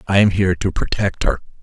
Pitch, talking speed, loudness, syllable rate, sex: 95 Hz, 220 wpm, -19 LUFS, 6.4 syllables/s, male